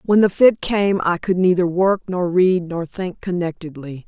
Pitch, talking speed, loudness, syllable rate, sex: 180 Hz, 190 wpm, -18 LUFS, 4.4 syllables/s, female